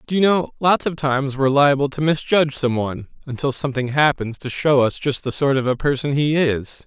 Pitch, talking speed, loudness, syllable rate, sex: 140 Hz, 225 wpm, -19 LUFS, 5.7 syllables/s, male